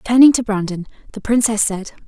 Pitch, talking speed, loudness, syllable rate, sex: 220 Hz, 175 wpm, -16 LUFS, 5.4 syllables/s, female